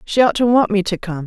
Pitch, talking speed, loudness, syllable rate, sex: 205 Hz, 330 wpm, -16 LUFS, 5.7 syllables/s, female